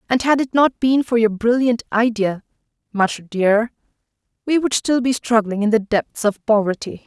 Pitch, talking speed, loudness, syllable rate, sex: 225 Hz, 180 wpm, -18 LUFS, 4.8 syllables/s, female